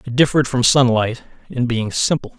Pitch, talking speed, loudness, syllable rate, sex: 125 Hz, 175 wpm, -17 LUFS, 5.5 syllables/s, male